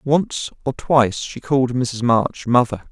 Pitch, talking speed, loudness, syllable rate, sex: 130 Hz, 165 wpm, -19 LUFS, 4.1 syllables/s, male